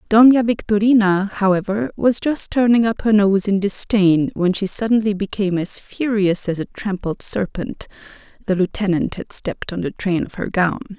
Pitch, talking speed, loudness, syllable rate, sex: 200 Hz, 165 wpm, -18 LUFS, 5.0 syllables/s, female